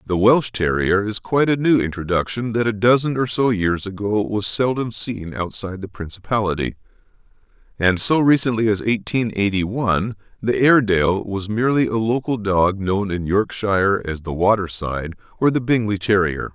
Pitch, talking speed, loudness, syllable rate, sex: 105 Hz, 165 wpm, -19 LUFS, 5.2 syllables/s, male